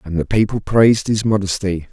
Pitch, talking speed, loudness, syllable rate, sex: 100 Hz, 190 wpm, -17 LUFS, 5.5 syllables/s, male